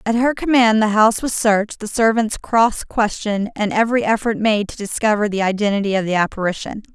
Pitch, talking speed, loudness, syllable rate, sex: 215 Hz, 190 wpm, -18 LUFS, 5.8 syllables/s, female